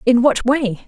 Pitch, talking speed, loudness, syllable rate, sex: 250 Hz, 205 wpm, -16 LUFS, 4.6 syllables/s, female